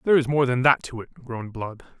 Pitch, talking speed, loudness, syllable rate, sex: 125 Hz, 270 wpm, -22 LUFS, 6.4 syllables/s, male